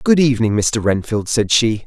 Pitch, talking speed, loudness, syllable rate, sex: 115 Hz, 195 wpm, -16 LUFS, 5.1 syllables/s, male